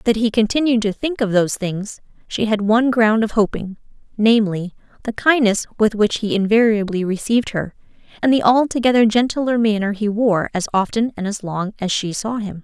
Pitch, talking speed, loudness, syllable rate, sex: 215 Hz, 185 wpm, -18 LUFS, 5.4 syllables/s, female